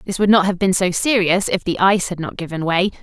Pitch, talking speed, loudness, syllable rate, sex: 185 Hz, 280 wpm, -17 LUFS, 6.1 syllables/s, female